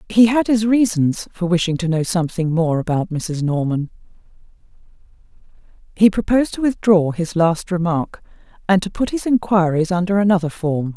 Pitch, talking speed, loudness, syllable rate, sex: 180 Hz, 155 wpm, -18 LUFS, 5.2 syllables/s, female